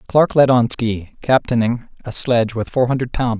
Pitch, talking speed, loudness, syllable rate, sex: 120 Hz, 195 wpm, -17 LUFS, 4.9 syllables/s, male